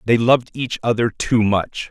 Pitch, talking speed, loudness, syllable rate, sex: 115 Hz, 190 wpm, -18 LUFS, 4.6 syllables/s, male